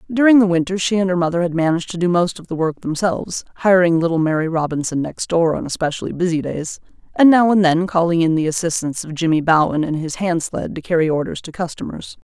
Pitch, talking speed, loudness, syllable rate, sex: 170 Hz, 225 wpm, -18 LUFS, 6.3 syllables/s, female